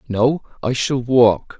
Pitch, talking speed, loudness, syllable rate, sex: 125 Hz, 150 wpm, -17 LUFS, 3.2 syllables/s, male